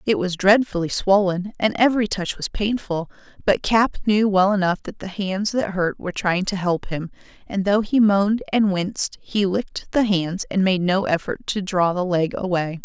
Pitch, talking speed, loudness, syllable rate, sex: 195 Hz, 200 wpm, -21 LUFS, 4.8 syllables/s, female